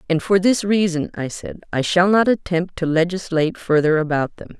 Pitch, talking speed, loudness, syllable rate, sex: 175 Hz, 195 wpm, -19 LUFS, 5.2 syllables/s, female